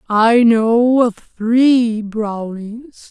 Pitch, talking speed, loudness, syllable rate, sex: 230 Hz, 95 wpm, -14 LUFS, 2.0 syllables/s, female